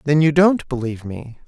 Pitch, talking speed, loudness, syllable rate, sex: 140 Hz, 205 wpm, -17 LUFS, 5.5 syllables/s, male